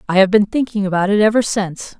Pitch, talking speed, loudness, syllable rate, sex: 200 Hz, 240 wpm, -16 LUFS, 6.6 syllables/s, female